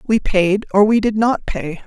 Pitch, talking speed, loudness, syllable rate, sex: 205 Hz, 225 wpm, -16 LUFS, 4.1 syllables/s, female